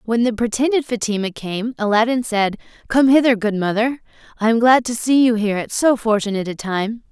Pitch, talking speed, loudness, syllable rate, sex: 225 Hz, 195 wpm, -18 LUFS, 5.6 syllables/s, female